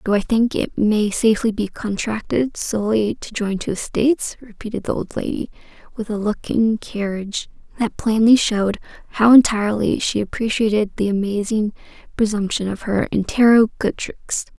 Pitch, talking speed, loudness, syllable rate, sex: 215 Hz, 145 wpm, -19 LUFS, 5.0 syllables/s, female